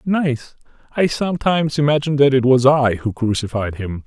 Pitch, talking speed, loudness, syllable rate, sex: 135 Hz, 160 wpm, -17 LUFS, 5.3 syllables/s, male